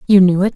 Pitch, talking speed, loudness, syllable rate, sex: 190 Hz, 325 wpm, -12 LUFS, 7.7 syllables/s, female